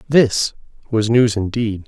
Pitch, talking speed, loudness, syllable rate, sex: 110 Hz, 130 wpm, -17 LUFS, 3.7 syllables/s, male